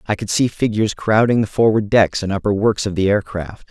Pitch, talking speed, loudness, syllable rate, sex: 105 Hz, 245 wpm, -17 LUFS, 5.6 syllables/s, male